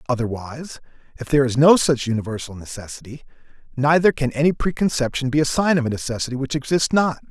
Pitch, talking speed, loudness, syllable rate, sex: 135 Hz, 170 wpm, -20 LUFS, 6.6 syllables/s, male